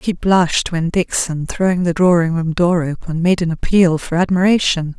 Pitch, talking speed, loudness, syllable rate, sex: 175 Hz, 180 wpm, -16 LUFS, 4.9 syllables/s, female